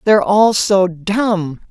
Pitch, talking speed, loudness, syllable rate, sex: 195 Hz, 140 wpm, -14 LUFS, 3.3 syllables/s, female